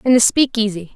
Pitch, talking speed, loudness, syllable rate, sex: 225 Hz, 190 wpm, -16 LUFS, 5.9 syllables/s, female